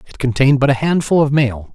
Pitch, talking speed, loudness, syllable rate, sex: 135 Hz, 240 wpm, -15 LUFS, 6.5 syllables/s, male